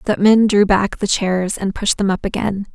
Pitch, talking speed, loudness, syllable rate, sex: 200 Hz, 240 wpm, -16 LUFS, 5.1 syllables/s, female